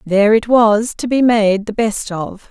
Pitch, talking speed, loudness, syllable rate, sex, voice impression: 215 Hz, 215 wpm, -14 LUFS, 4.2 syllables/s, female, feminine, middle-aged, powerful, clear, slightly halting, calm, slightly friendly, slightly elegant, lively, strict, intense, slightly sharp